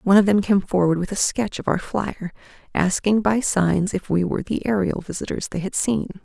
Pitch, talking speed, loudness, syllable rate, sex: 195 Hz, 220 wpm, -21 LUFS, 5.3 syllables/s, female